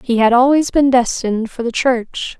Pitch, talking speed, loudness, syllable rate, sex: 250 Hz, 200 wpm, -15 LUFS, 4.8 syllables/s, female